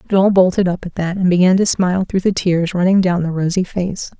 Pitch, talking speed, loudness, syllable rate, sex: 180 Hz, 245 wpm, -16 LUFS, 5.6 syllables/s, female